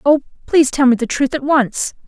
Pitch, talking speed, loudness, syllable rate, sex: 275 Hz, 230 wpm, -16 LUFS, 5.5 syllables/s, female